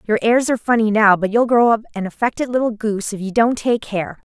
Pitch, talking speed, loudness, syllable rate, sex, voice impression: 220 Hz, 250 wpm, -17 LUFS, 6.1 syllables/s, female, feminine, adult-like, tensed, powerful, clear, raspy, intellectual, friendly, unique, lively, slightly intense, slightly sharp